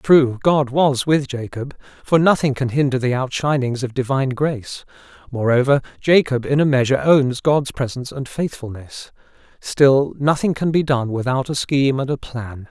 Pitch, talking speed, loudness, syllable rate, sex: 135 Hz, 160 wpm, -18 LUFS, 5.0 syllables/s, male